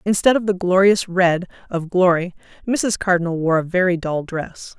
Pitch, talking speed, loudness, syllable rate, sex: 180 Hz, 175 wpm, -19 LUFS, 4.9 syllables/s, female